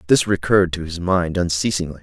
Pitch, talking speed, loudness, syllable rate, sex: 90 Hz, 180 wpm, -19 LUFS, 6.0 syllables/s, male